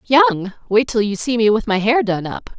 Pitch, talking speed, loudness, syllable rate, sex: 225 Hz, 230 wpm, -17 LUFS, 5.3 syllables/s, female